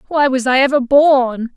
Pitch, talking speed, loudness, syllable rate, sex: 265 Hz, 190 wpm, -13 LUFS, 4.5 syllables/s, female